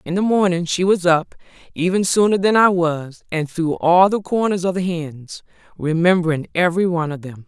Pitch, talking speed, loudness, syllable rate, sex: 175 Hz, 195 wpm, -18 LUFS, 5.2 syllables/s, female